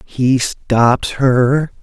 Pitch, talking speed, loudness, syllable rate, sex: 130 Hz, 100 wpm, -14 LUFS, 1.8 syllables/s, male